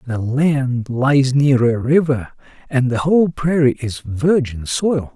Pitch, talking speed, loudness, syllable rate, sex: 135 Hz, 150 wpm, -17 LUFS, 3.7 syllables/s, male